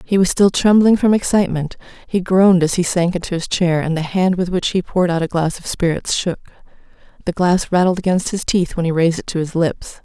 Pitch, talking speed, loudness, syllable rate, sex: 180 Hz, 240 wpm, -17 LUFS, 5.8 syllables/s, female